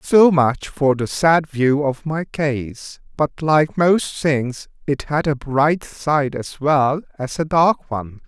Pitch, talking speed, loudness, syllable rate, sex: 145 Hz, 175 wpm, -19 LUFS, 3.3 syllables/s, male